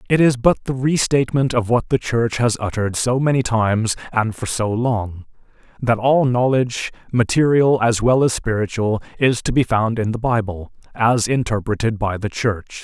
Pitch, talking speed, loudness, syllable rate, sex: 115 Hz, 175 wpm, -18 LUFS, 4.8 syllables/s, male